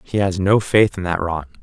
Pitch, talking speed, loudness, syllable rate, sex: 95 Hz, 260 wpm, -18 LUFS, 5.0 syllables/s, male